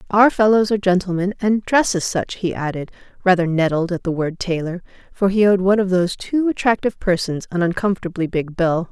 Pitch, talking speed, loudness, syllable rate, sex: 185 Hz, 195 wpm, -19 LUFS, 5.9 syllables/s, female